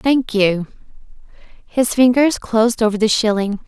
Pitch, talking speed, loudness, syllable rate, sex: 225 Hz, 130 wpm, -16 LUFS, 4.5 syllables/s, female